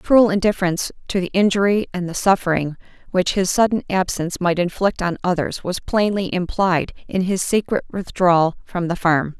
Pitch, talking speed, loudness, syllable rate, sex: 185 Hz, 165 wpm, -19 LUFS, 5.2 syllables/s, female